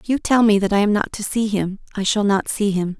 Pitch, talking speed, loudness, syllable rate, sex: 205 Hz, 320 wpm, -19 LUFS, 5.9 syllables/s, female